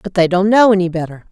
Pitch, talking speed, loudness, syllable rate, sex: 185 Hz, 275 wpm, -13 LUFS, 6.5 syllables/s, female